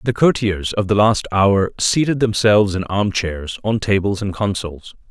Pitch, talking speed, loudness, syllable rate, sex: 100 Hz, 165 wpm, -17 LUFS, 4.7 syllables/s, male